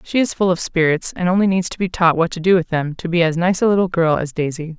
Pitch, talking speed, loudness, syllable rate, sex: 175 Hz, 315 wpm, -18 LUFS, 6.2 syllables/s, female